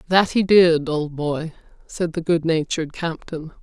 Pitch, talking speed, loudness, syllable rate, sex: 165 Hz, 150 wpm, -20 LUFS, 4.4 syllables/s, female